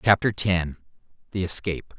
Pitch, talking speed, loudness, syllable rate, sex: 95 Hz, 120 wpm, -25 LUFS, 5.4 syllables/s, male